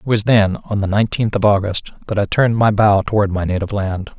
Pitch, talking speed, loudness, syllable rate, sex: 105 Hz, 245 wpm, -17 LUFS, 6.1 syllables/s, male